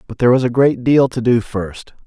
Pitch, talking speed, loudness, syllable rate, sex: 120 Hz, 260 wpm, -15 LUFS, 5.5 syllables/s, male